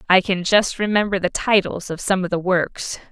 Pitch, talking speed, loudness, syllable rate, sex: 190 Hz, 210 wpm, -19 LUFS, 4.9 syllables/s, female